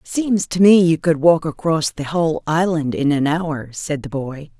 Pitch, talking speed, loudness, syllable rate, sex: 160 Hz, 210 wpm, -18 LUFS, 4.3 syllables/s, female